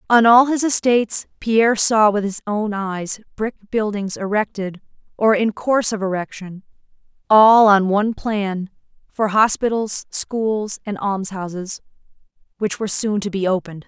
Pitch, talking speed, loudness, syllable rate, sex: 210 Hz, 145 wpm, -18 LUFS, 4.6 syllables/s, female